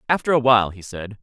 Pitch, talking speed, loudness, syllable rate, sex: 115 Hz, 245 wpm, -18 LUFS, 6.8 syllables/s, male